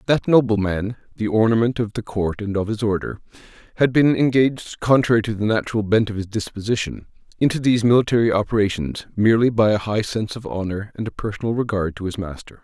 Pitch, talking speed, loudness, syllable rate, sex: 110 Hz, 190 wpm, -20 LUFS, 6.2 syllables/s, male